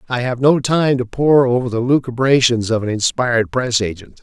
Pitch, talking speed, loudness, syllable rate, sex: 125 Hz, 200 wpm, -16 LUFS, 5.2 syllables/s, male